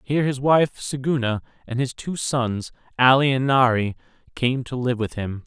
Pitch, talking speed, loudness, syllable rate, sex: 125 Hz, 175 wpm, -22 LUFS, 4.7 syllables/s, male